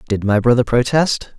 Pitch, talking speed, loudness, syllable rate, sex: 120 Hz, 175 wpm, -16 LUFS, 5.0 syllables/s, male